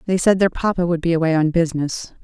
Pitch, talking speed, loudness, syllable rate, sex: 170 Hz, 240 wpm, -19 LUFS, 6.5 syllables/s, female